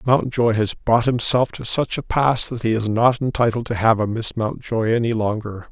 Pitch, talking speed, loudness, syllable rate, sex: 115 Hz, 210 wpm, -20 LUFS, 4.9 syllables/s, male